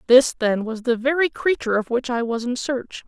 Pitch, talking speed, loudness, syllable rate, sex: 250 Hz, 235 wpm, -21 LUFS, 5.4 syllables/s, female